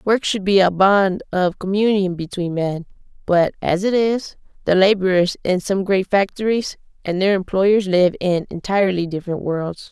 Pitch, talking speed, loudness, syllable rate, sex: 190 Hz, 165 wpm, -18 LUFS, 4.7 syllables/s, female